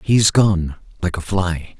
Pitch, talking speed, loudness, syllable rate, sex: 95 Hz, 200 wpm, -18 LUFS, 4.1 syllables/s, male